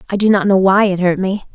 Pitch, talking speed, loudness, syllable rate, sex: 190 Hz, 310 wpm, -14 LUFS, 6.3 syllables/s, female